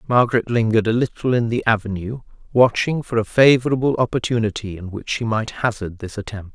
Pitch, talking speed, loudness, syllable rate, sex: 115 Hz, 175 wpm, -19 LUFS, 5.9 syllables/s, male